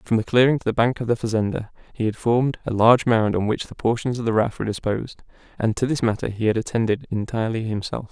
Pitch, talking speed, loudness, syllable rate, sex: 115 Hz, 245 wpm, -22 LUFS, 6.7 syllables/s, male